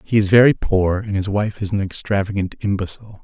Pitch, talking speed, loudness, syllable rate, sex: 100 Hz, 205 wpm, -19 LUFS, 5.8 syllables/s, male